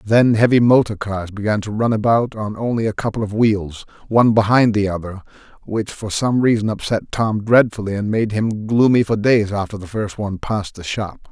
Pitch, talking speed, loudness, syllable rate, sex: 105 Hz, 200 wpm, -18 LUFS, 5.3 syllables/s, male